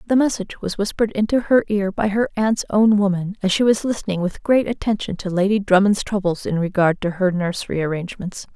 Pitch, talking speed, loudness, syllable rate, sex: 200 Hz, 205 wpm, -20 LUFS, 5.9 syllables/s, female